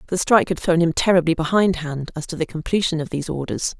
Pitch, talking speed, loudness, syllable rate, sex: 170 Hz, 220 wpm, -20 LUFS, 6.5 syllables/s, female